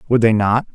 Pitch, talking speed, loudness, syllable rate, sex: 115 Hz, 245 wpm, -16 LUFS, 5.9 syllables/s, male